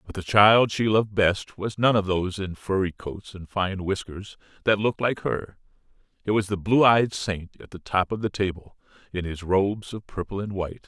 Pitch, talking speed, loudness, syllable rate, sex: 100 Hz, 215 wpm, -24 LUFS, 5.1 syllables/s, male